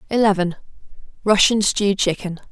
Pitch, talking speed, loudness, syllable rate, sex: 200 Hz, 70 wpm, -18 LUFS, 5.8 syllables/s, female